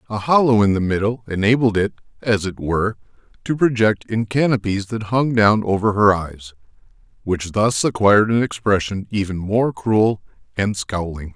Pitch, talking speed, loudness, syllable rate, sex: 105 Hz, 160 wpm, -19 LUFS, 4.8 syllables/s, male